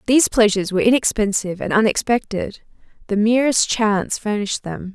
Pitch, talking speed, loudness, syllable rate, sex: 215 Hz, 135 wpm, -18 LUFS, 6.0 syllables/s, female